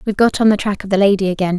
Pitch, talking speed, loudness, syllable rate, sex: 200 Hz, 340 wpm, -15 LUFS, 8.2 syllables/s, female